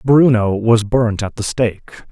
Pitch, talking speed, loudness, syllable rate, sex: 115 Hz, 170 wpm, -15 LUFS, 4.0 syllables/s, male